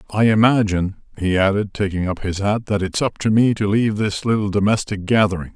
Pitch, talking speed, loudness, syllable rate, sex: 100 Hz, 205 wpm, -19 LUFS, 6.0 syllables/s, male